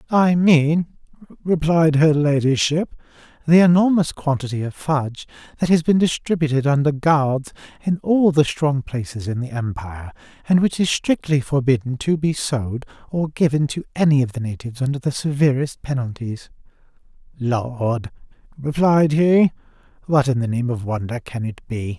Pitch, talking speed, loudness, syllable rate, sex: 145 Hz, 150 wpm, -19 LUFS, 4.8 syllables/s, male